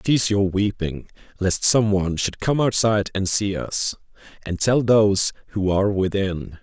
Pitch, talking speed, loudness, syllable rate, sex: 100 Hz, 165 wpm, -21 LUFS, 4.7 syllables/s, male